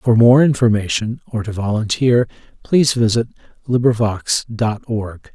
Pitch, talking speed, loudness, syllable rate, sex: 115 Hz, 125 wpm, -17 LUFS, 4.6 syllables/s, male